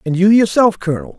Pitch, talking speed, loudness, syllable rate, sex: 190 Hz, 205 wpm, -14 LUFS, 6.4 syllables/s, male